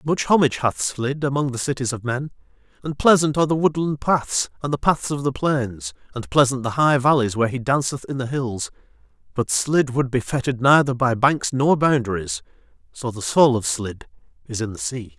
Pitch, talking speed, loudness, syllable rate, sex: 130 Hz, 200 wpm, -21 LUFS, 5.3 syllables/s, male